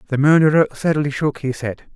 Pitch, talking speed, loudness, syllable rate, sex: 145 Hz, 185 wpm, -18 LUFS, 5.4 syllables/s, male